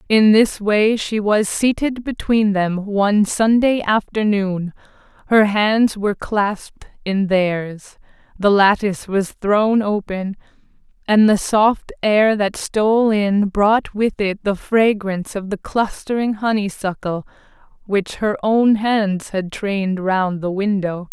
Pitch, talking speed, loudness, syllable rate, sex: 205 Hz, 135 wpm, -18 LUFS, 3.7 syllables/s, female